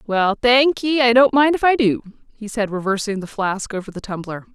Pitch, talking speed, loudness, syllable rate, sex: 225 Hz, 225 wpm, -18 LUFS, 5.2 syllables/s, female